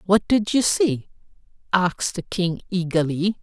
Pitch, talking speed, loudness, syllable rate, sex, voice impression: 185 Hz, 140 wpm, -22 LUFS, 4.3 syllables/s, female, feminine, very adult-like, slightly clear, intellectual, slightly calm, slightly sharp